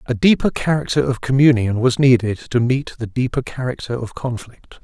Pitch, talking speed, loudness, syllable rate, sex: 125 Hz, 175 wpm, -18 LUFS, 5.2 syllables/s, male